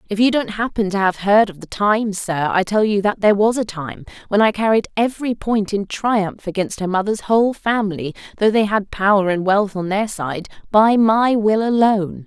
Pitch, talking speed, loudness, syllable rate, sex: 205 Hz, 215 wpm, -18 LUFS, 5.2 syllables/s, female